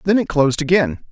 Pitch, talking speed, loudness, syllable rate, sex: 155 Hz, 215 wpm, -17 LUFS, 6.3 syllables/s, male